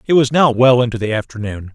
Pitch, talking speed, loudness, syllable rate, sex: 120 Hz, 240 wpm, -15 LUFS, 6.2 syllables/s, male